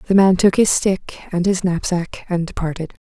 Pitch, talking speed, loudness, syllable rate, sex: 180 Hz, 195 wpm, -18 LUFS, 4.7 syllables/s, female